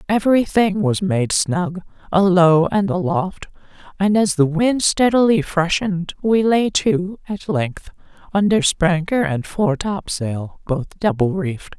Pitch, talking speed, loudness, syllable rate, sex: 185 Hz, 130 wpm, -18 LUFS, 4.0 syllables/s, female